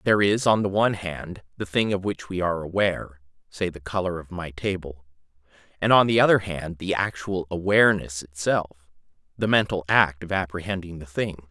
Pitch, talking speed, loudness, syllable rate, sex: 90 Hz, 170 wpm, -24 LUFS, 5.5 syllables/s, male